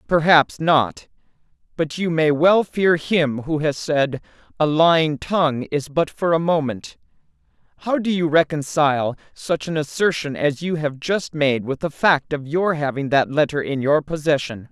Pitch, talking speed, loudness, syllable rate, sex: 155 Hz, 170 wpm, -20 LUFS, 4.4 syllables/s, female